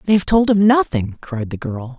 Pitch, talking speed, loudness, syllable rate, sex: 155 Hz, 240 wpm, -17 LUFS, 5.0 syllables/s, male